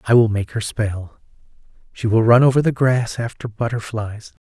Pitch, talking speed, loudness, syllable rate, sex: 115 Hz, 175 wpm, -19 LUFS, 4.9 syllables/s, male